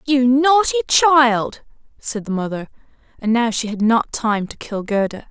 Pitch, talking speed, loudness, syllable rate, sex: 240 Hz, 170 wpm, -17 LUFS, 4.3 syllables/s, female